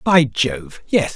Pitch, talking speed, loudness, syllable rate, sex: 130 Hz, 155 wpm, -18 LUFS, 3.0 syllables/s, male